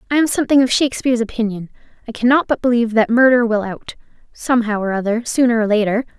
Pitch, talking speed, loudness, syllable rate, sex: 235 Hz, 195 wpm, -16 LUFS, 6.9 syllables/s, female